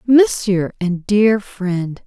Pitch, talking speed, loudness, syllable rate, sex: 200 Hz, 115 wpm, -17 LUFS, 2.7 syllables/s, female